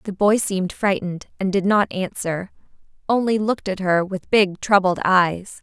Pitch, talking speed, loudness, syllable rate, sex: 195 Hz, 170 wpm, -20 LUFS, 4.8 syllables/s, female